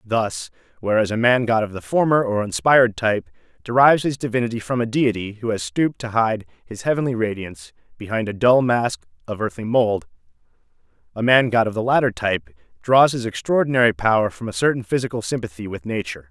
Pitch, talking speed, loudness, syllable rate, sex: 115 Hz, 185 wpm, -20 LUFS, 6.1 syllables/s, male